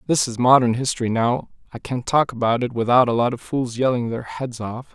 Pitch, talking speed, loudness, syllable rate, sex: 120 Hz, 230 wpm, -20 LUFS, 5.5 syllables/s, male